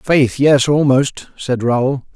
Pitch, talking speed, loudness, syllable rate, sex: 135 Hz, 140 wpm, -15 LUFS, 3.1 syllables/s, male